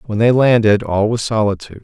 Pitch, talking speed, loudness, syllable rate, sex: 110 Hz, 195 wpm, -15 LUFS, 5.9 syllables/s, male